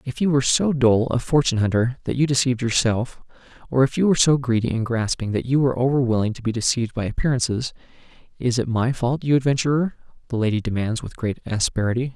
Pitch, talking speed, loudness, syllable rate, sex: 125 Hz, 205 wpm, -21 LUFS, 6.5 syllables/s, male